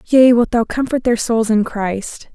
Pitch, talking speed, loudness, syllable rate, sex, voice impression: 230 Hz, 205 wpm, -16 LUFS, 4.0 syllables/s, female, very feminine, young, slightly adult-like, very thin, slightly tensed, slightly weak, slightly dark, hard, clear, fluent, slightly raspy, slightly cute, cool, very intellectual, refreshing, very sincere, very calm, very friendly, very reassuring, unique, elegant, slightly wild, sweet, lively, strict, slightly intense, slightly sharp, slightly modest, light